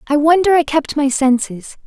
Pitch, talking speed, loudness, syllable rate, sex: 290 Hz, 195 wpm, -14 LUFS, 4.8 syllables/s, female